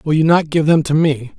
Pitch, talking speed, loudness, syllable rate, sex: 155 Hz, 305 wpm, -14 LUFS, 5.3 syllables/s, male